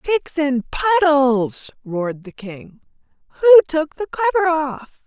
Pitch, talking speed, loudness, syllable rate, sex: 295 Hz, 130 wpm, -17 LUFS, 3.7 syllables/s, female